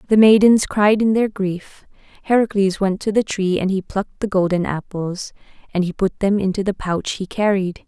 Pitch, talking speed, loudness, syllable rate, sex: 195 Hz, 200 wpm, -18 LUFS, 5.0 syllables/s, female